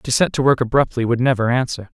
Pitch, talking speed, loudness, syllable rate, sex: 125 Hz, 240 wpm, -18 LUFS, 6.3 syllables/s, male